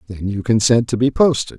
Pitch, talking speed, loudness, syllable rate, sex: 115 Hz, 225 wpm, -16 LUFS, 5.5 syllables/s, male